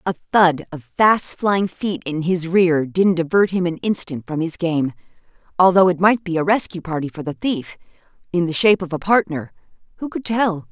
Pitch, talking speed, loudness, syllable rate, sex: 175 Hz, 195 wpm, -19 LUFS, 4.9 syllables/s, female